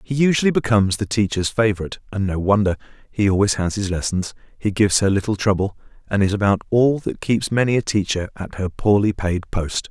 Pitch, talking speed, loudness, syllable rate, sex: 105 Hz, 200 wpm, -20 LUFS, 5.9 syllables/s, male